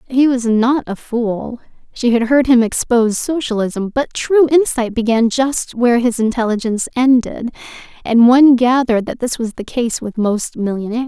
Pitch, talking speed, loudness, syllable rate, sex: 240 Hz, 155 wpm, -15 LUFS, 4.9 syllables/s, female